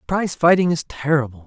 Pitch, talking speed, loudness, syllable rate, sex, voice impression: 155 Hz, 165 wpm, -19 LUFS, 6.1 syllables/s, male, very masculine, very adult-like, very middle-aged, very thick, tensed, very powerful, slightly bright, slightly soft, slightly muffled, fluent, slightly raspy, very cool, very intellectual, very sincere, very calm, very mature, very friendly, very reassuring, unique, elegant, wild, sweet, slightly lively, kind, slightly intense